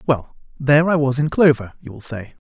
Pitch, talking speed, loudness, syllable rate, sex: 135 Hz, 220 wpm, -18 LUFS, 5.6 syllables/s, male